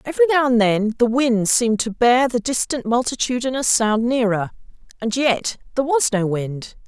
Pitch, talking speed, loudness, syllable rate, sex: 240 Hz, 175 wpm, -19 LUFS, 5.1 syllables/s, female